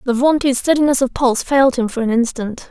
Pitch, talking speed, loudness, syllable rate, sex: 255 Hz, 220 wpm, -16 LUFS, 6.2 syllables/s, female